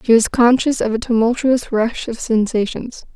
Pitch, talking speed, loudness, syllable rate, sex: 235 Hz, 170 wpm, -17 LUFS, 4.7 syllables/s, female